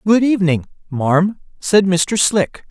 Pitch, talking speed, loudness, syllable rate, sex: 185 Hz, 135 wpm, -16 LUFS, 3.8 syllables/s, male